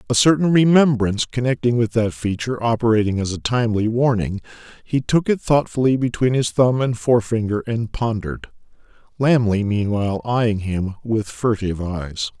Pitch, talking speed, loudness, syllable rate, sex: 115 Hz, 145 wpm, -19 LUFS, 5.2 syllables/s, male